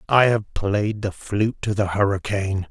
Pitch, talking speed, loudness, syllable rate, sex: 105 Hz, 180 wpm, -22 LUFS, 4.9 syllables/s, male